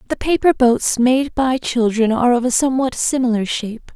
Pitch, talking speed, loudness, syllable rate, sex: 245 Hz, 180 wpm, -17 LUFS, 5.4 syllables/s, female